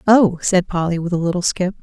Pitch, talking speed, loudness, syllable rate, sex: 180 Hz, 230 wpm, -18 LUFS, 5.7 syllables/s, female